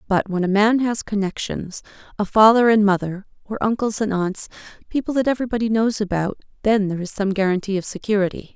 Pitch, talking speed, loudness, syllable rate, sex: 205 Hz, 180 wpm, -20 LUFS, 6.0 syllables/s, female